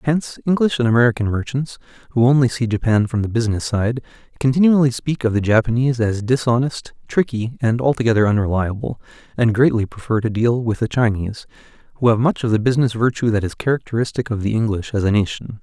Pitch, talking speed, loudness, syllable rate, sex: 120 Hz, 185 wpm, -18 LUFS, 6.3 syllables/s, male